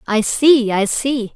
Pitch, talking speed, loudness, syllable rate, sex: 240 Hz, 175 wpm, -15 LUFS, 3.5 syllables/s, female